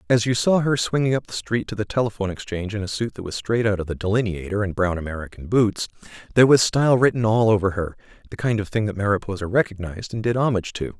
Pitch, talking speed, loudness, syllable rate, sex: 105 Hz, 235 wpm, -22 LUFS, 6.8 syllables/s, male